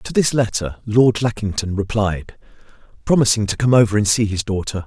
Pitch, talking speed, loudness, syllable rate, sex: 105 Hz, 175 wpm, -18 LUFS, 5.3 syllables/s, male